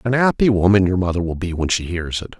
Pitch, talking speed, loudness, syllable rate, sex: 95 Hz, 275 wpm, -18 LUFS, 6.1 syllables/s, male